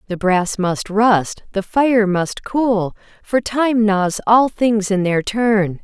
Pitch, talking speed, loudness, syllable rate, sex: 210 Hz, 165 wpm, -17 LUFS, 3.1 syllables/s, female